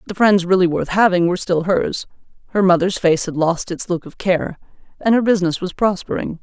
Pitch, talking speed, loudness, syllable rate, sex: 180 Hz, 205 wpm, -18 LUFS, 5.6 syllables/s, female